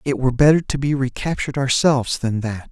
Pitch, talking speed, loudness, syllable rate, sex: 135 Hz, 200 wpm, -19 LUFS, 6.1 syllables/s, male